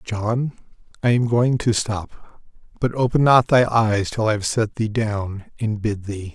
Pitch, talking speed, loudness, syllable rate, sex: 110 Hz, 190 wpm, -20 LUFS, 3.9 syllables/s, male